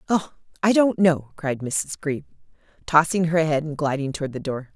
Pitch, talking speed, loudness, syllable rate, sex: 160 Hz, 190 wpm, -22 LUFS, 5.0 syllables/s, female